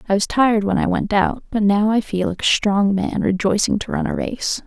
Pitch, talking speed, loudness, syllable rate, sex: 205 Hz, 255 wpm, -19 LUFS, 5.2 syllables/s, female